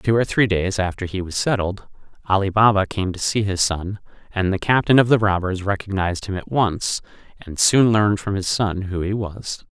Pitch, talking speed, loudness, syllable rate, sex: 100 Hz, 210 wpm, -20 LUFS, 5.2 syllables/s, male